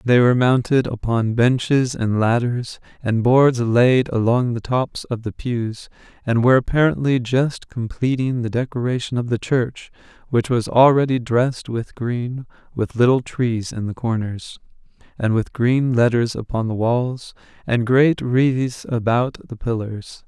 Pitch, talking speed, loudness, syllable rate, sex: 120 Hz, 150 wpm, -19 LUFS, 4.2 syllables/s, male